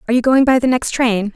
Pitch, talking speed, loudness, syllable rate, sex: 245 Hz, 310 wpm, -15 LUFS, 6.8 syllables/s, female